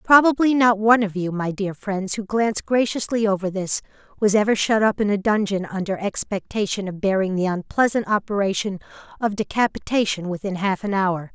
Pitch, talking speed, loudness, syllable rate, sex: 205 Hz, 175 wpm, -21 LUFS, 5.4 syllables/s, female